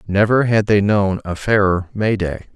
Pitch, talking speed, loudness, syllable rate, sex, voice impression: 100 Hz, 190 wpm, -17 LUFS, 4.5 syllables/s, male, masculine, adult-like, sincere, calm, slightly wild